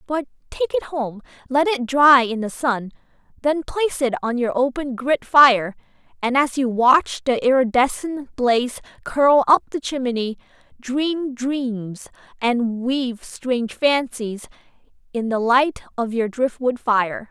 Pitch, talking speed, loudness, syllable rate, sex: 255 Hz, 145 wpm, -20 LUFS, 3.9 syllables/s, female